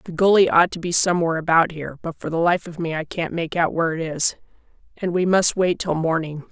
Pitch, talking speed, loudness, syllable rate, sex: 170 Hz, 250 wpm, -20 LUFS, 6.1 syllables/s, female